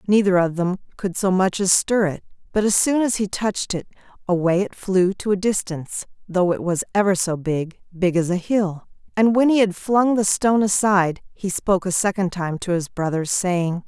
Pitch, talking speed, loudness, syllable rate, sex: 190 Hz, 210 wpm, -20 LUFS, 5.1 syllables/s, female